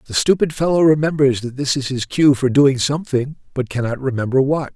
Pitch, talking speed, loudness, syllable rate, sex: 135 Hz, 200 wpm, -17 LUFS, 5.7 syllables/s, male